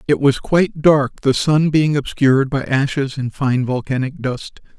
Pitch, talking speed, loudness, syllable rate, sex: 140 Hz, 175 wpm, -17 LUFS, 4.5 syllables/s, male